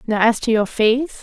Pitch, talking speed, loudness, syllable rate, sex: 230 Hz, 245 wpm, -17 LUFS, 4.4 syllables/s, female